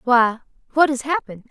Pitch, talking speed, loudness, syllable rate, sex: 250 Hz, 160 wpm, -20 LUFS, 5.9 syllables/s, female